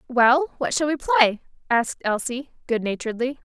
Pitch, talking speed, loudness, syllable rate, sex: 250 Hz, 155 wpm, -22 LUFS, 5.1 syllables/s, female